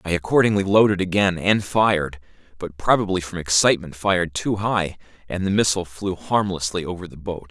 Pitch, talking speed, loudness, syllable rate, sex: 95 Hz, 170 wpm, -21 LUFS, 5.7 syllables/s, male